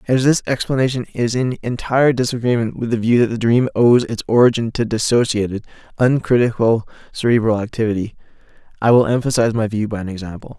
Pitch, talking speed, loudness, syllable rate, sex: 115 Hz, 165 wpm, -17 LUFS, 6.1 syllables/s, male